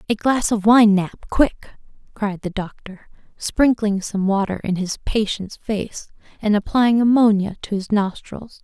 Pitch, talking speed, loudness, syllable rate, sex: 210 Hz, 155 wpm, -19 LUFS, 4.1 syllables/s, female